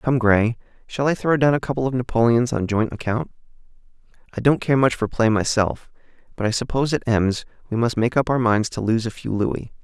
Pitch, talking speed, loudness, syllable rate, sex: 120 Hz, 220 wpm, -21 LUFS, 5.6 syllables/s, male